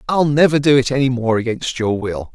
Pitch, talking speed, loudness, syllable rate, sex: 130 Hz, 230 wpm, -16 LUFS, 5.5 syllables/s, male